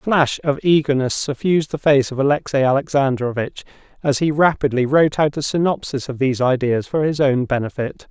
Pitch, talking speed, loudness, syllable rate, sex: 140 Hz, 180 wpm, -18 LUFS, 5.6 syllables/s, male